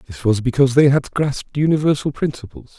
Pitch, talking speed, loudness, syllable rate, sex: 130 Hz, 175 wpm, -18 LUFS, 6.2 syllables/s, male